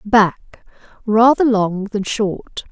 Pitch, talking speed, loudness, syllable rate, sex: 215 Hz, 90 wpm, -16 LUFS, 2.8 syllables/s, female